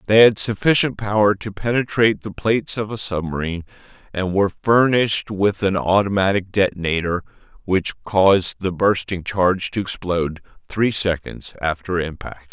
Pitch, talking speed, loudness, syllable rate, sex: 95 Hz, 140 wpm, -19 LUFS, 5.1 syllables/s, male